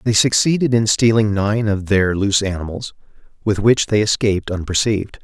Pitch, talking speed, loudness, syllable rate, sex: 105 Hz, 160 wpm, -17 LUFS, 5.4 syllables/s, male